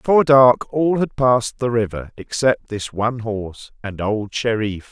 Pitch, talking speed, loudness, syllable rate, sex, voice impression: 115 Hz, 170 wpm, -18 LUFS, 4.6 syllables/s, male, very masculine, very adult-like, middle-aged, very thick, slightly tensed, slightly powerful, slightly bright, slightly soft, slightly clear, slightly fluent, slightly cool, slightly intellectual, slightly refreshing, sincere, calm, mature, slightly friendly, reassuring, wild, slightly lively, kind